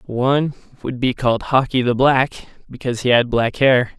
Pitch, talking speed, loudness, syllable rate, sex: 125 Hz, 180 wpm, -18 LUFS, 5.2 syllables/s, male